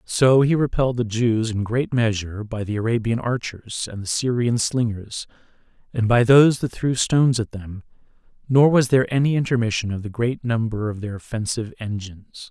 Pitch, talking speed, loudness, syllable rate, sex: 115 Hz, 180 wpm, -21 LUFS, 5.4 syllables/s, male